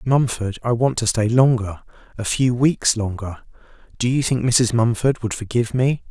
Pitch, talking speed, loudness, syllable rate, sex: 115 Hz, 165 wpm, -19 LUFS, 4.7 syllables/s, male